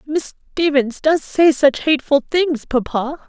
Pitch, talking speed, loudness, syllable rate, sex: 285 Hz, 145 wpm, -17 LUFS, 4.2 syllables/s, female